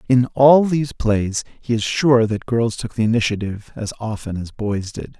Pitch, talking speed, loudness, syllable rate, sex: 115 Hz, 195 wpm, -19 LUFS, 4.9 syllables/s, male